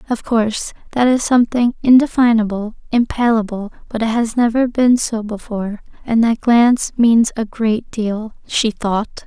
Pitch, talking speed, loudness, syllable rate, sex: 230 Hz, 150 wpm, -16 LUFS, 4.7 syllables/s, female